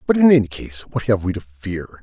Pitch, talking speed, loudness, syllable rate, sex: 105 Hz, 265 wpm, -19 LUFS, 5.3 syllables/s, male